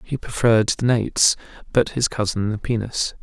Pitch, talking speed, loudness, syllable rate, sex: 110 Hz, 170 wpm, -20 LUFS, 5.2 syllables/s, male